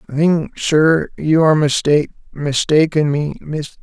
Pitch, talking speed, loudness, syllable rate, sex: 150 Hz, 95 wpm, -16 LUFS, 4.1 syllables/s, male